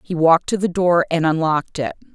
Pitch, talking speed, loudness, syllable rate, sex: 170 Hz, 225 wpm, -18 LUFS, 6.1 syllables/s, female